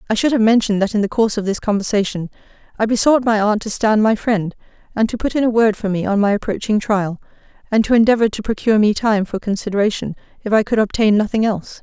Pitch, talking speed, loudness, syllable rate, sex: 215 Hz, 235 wpm, -17 LUFS, 6.6 syllables/s, female